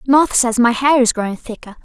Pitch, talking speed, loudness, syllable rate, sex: 245 Hz, 230 wpm, -15 LUFS, 6.0 syllables/s, female